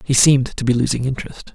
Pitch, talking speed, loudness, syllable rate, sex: 130 Hz, 235 wpm, -17 LUFS, 6.9 syllables/s, male